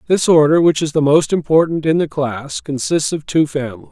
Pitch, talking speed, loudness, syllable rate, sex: 150 Hz, 215 wpm, -15 LUFS, 5.4 syllables/s, male